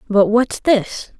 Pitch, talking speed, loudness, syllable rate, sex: 220 Hz, 150 wpm, -16 LUFS, 3.1 syllables/s, female